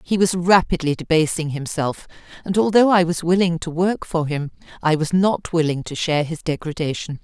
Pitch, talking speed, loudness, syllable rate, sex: 165 Hz, 185 wpm, -20 LUFS, 5.3 syllables/s, female